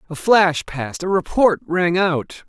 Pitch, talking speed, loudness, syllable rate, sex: 170 Hz, 170 wpm, -18 LUFS, 4.0 syllables/s, male